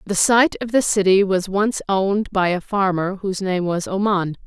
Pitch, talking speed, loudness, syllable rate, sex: 195 Hz, 200 wpm, -19 LUFS, 4.8 syllables/s, female